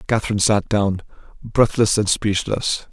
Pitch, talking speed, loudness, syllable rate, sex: 105 Hz, 125 wpm, -19 LUFS, 4.7 syllables/s, male